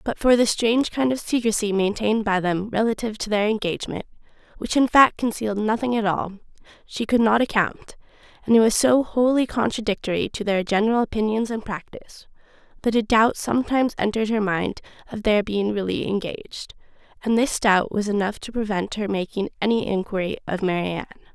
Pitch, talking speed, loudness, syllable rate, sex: 215 Hz, 175 wpm, -22 LUFS, 5.8 syllables/s, female